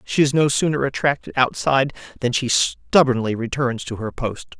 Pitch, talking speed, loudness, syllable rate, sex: 130 Hz, 170 wpm, -20 LUFS, 5.1 syllables/s, male